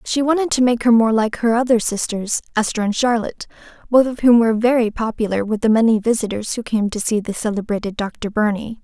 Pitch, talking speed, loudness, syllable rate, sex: 225 Hz, 210 wpm, -18 LUFS, 5.9 syllables/s, female